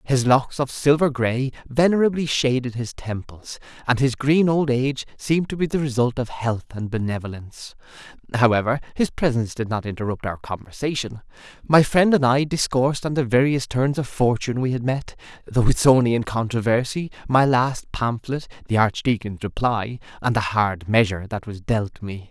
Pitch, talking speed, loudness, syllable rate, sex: 125 Hz, 165 wpm, -21 LUFS, 5.1 syllables/s, male